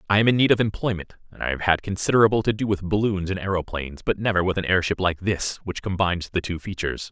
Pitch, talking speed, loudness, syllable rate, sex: 95 Hz, 245 wpm, -23 LUFS, 6.7 syllables/s, male